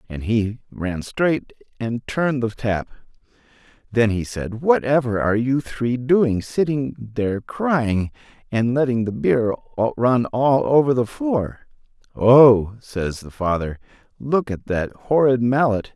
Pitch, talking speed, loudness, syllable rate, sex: 120 Hz, 140 wpm, -20 LUFS, 3.7 syllables/s, male